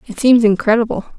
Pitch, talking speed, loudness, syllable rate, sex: 225 Hz, 150 wpm, -14 LUFS, 6.1 syllables/s, female